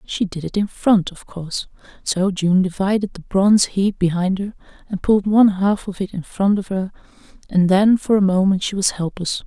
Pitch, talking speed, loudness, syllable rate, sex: 195 Hz, 210 wpm, -18 LUFS, 5.2 syllables/s, female